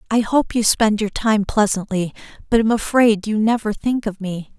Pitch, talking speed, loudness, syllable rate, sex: 215 Hz, 195 wpm, -18 LUFS, 4.8 syllables/s, female